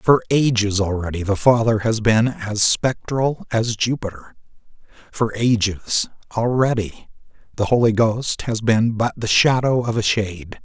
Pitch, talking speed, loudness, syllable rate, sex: 110 Hz, 140 wpm, -19 LUFS, 4.2 syllables/s, male